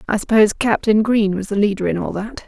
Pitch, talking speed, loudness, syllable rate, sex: 210 Hz, 245 wpm, -17 LUFS, 6.1 syllables/s, female